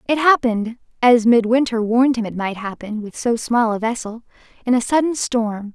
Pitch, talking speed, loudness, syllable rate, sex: 235 Hz, 190 wpm, -18 LUFS, 2.4 syllables/s, female